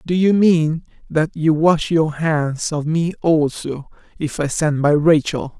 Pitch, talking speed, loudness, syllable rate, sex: 155 Hz, 170 wpm, -18 LUFS, 3.8 syllables/s, male